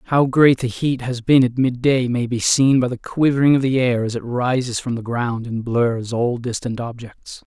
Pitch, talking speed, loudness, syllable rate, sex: 125 Hz, 220 wpm, -19 LUFS, 4.6 syllables/s, male